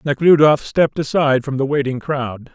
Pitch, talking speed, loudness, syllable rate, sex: 140 Hz, 165 wpm, -16 LUFS, 5.4 syllables/s, male